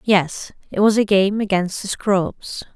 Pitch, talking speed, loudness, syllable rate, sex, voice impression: 200 Hz, 175 wpm, -19 LUFS, 3.7 syllables/s, female, feminine, adult-like, slightly muffled, slightly intellectual, slightly calm, slightly elegant